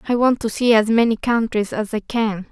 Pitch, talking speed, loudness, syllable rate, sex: 225 Hz, 240 wpm, -19 LUFS, 5.2 syllables/s, female